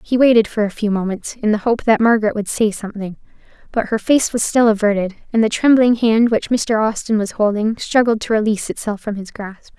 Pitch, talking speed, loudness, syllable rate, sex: 220 Hz, 220 wpm, -17 LUFS, 5.8 syllables/s, female